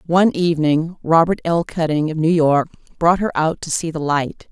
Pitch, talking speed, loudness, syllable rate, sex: 160 Hz, 200 wpm, -18 LUFS, 5.1 syllables/s, female